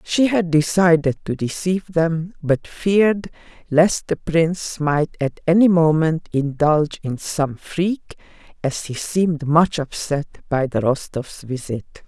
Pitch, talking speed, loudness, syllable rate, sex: 160 Hz, 140 wpm, -20 LUFS, 4.1 syllables/s, female